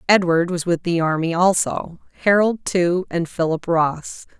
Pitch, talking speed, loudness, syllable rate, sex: 175 Hz, 150 wpm, -19 LUFS, 4.1 syllables/s, female